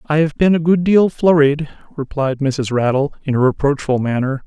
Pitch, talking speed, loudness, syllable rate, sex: 145 Hz, 190 wpm, -16 LUFS, 5.0 syllables/s, male